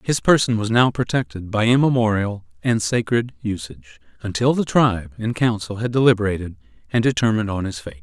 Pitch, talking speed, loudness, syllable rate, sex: 110 Hz, 165 wpm, -20 LUFS, 5.8 syllables/s, male